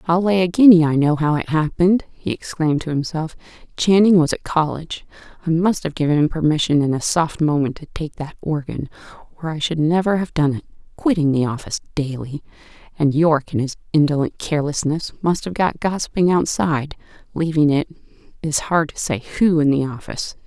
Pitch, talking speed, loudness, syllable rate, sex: 160 Hz, 180 wpm, -19 LUFS, 5.7 syllables/s, female